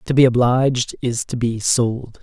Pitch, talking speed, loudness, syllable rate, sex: 120 Hz, 190 wpm, -18 LUFS, 4.3 syllables/s, male